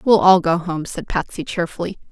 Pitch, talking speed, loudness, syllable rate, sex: 180 Hz, 200 wpm, -19 LUFS, 5.3 syllables/s, female